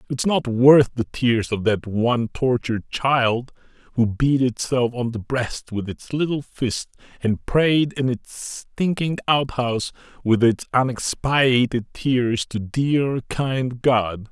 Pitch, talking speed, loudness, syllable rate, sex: 125 Hz, 145 wpm, -21 LUFS, 3.6 syllables/s, male